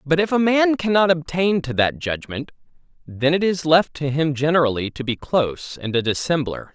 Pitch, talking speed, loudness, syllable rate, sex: 155 Hz, 195 wpm, -20 LUFS, 5.1 syllables/s, male